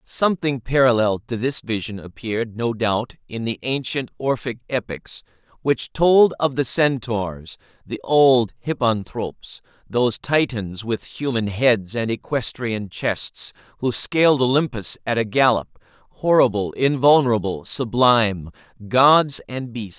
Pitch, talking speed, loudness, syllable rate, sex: 120 Hz, 120 wpm, -20 LUFS, 4.2 syllables/s, male